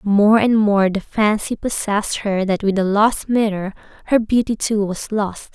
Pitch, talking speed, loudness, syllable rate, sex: 210 Hz, 185 wpm, -18 LUFS, 4.4 syllables/s, female